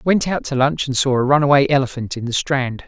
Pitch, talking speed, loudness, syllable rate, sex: 135 Hz, 250 wpm, -18 LUFS, 5.8 syllables/s, male